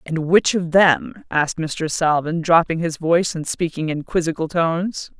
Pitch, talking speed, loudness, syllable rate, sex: 165 Hz, 175 wpm, -19 LUFS, 4.6 syllables/s, female